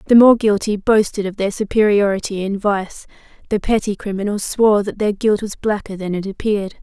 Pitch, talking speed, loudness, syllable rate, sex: 205 Hz, 185 wpm, -18 LUFS, 5.6 syllables/s, female